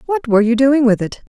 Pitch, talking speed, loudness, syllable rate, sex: 250 Hz, 275 wpm, -14 LUFS, 6.2 syllables/s, female